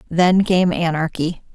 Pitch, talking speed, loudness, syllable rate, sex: 170 Hz, 115 wpm, -18 LUFS, 4.0 syllables/s, female